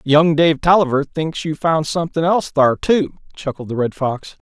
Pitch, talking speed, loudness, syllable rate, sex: 155 Hz, 185 wpm, -17 LUFS, 4.9 syllables/s, male